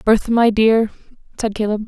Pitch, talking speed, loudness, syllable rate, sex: 220 Hz, 160 wpm, -17 LUFS, 5.5 syllables/s, female